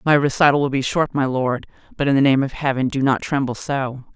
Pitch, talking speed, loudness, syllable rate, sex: 135 Hz, 245 wpm, -19 LUFS, 5.7 syllables/s, female